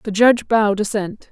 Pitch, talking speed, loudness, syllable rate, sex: 215 Hz, 180 wpm, -17 LUFS, 5.9 syllables/s, female